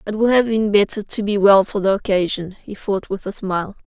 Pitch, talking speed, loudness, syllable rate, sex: 200 Hz, 250 wpm, -18 LUFS, 5.6 syllables/s, female